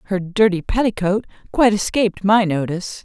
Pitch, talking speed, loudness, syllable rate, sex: 200 Hz, 140 wpm, -18 LUFS, 5.9 syllables/s, female